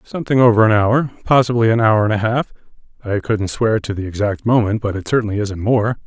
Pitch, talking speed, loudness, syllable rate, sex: 110 Hz, 210 wpm, -16 LUFS, 5.9 syllables/s, male